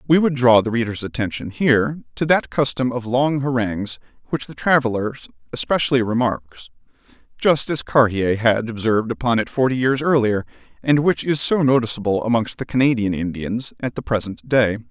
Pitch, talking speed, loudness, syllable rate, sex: 120 Hz, 165 wpm, -19 LUFS, 5.4 syllables/s, male